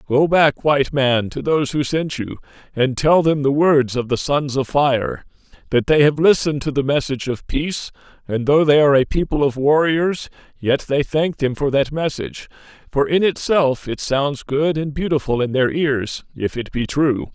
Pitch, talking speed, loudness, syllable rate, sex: 140 Hz, 200 wpm, -18 LUFS, 4.8 syllables/s, male